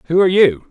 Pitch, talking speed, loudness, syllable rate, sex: 175 Hz, 255 wpm, -13 LUFS, 8.0 syllables/s, male